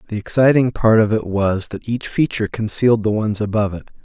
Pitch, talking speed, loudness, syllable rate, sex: 110 Hz, 210 wpm, -18 LUFS, 6.1 syllables/s, male